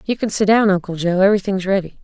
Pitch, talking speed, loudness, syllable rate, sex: 195 Hz, 205 wpm, -17 LUFS, 6.8 syllables/s, female